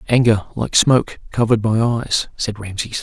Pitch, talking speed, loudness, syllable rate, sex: 115 Hz, 160 wpm, -18 LUFS, 5.4 syllables/s, male